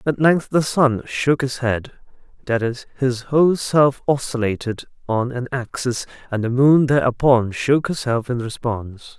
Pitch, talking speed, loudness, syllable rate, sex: 125 Hz, 155 wpm, -19 LUFS, 4.3 syllables/s, male